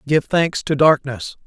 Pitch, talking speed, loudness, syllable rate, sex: 150 Hz, 165 wpm, -17 LUFS, 4.1 syllables/s, male